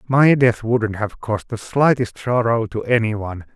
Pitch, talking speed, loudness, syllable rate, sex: 115 Hz, 185 wpm, -19 LUFS, 4.8 syllables/s, male